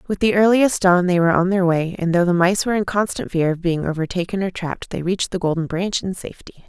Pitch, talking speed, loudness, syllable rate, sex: 180 Hz, 260 wpm, -19 LUFS, 6.4 syllables/s, female